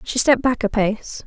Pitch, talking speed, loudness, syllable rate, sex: 235 Hz, 235 wpm, -19 LUFS, 5.2 syllables/s, female